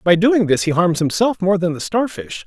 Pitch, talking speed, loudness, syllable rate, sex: 185 Hz, 245 wpm, -17 LUFS, 5.1 syllables/s, male